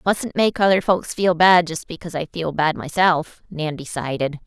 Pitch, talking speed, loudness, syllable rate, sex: 170 Hz, 190 wpm, -20 LUFS, 4.8 syllables/s, female